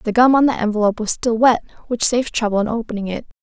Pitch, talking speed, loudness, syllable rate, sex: 225 Hz, 245 wpm, -18 LUFS, 7.2 syllables/s, female